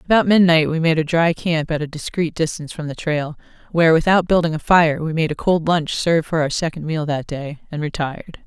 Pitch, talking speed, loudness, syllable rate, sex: 160 Hz, 235 wpm, -19 LUFS, 5.7 syllables/s, female